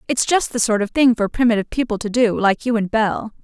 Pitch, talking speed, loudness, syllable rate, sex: 225 Hz, 260 wpm, -18 LUFS, 6.0 syllables/s, female